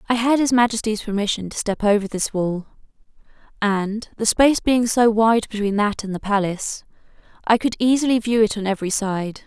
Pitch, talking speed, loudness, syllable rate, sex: 215 Hz, 185 wpm, -20 LUFS, 5.6 syllables/s, female